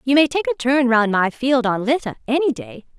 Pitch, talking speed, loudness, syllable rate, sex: 255 Hz, 240 wpm, -18 LUFS, 5.2 syllables/s, female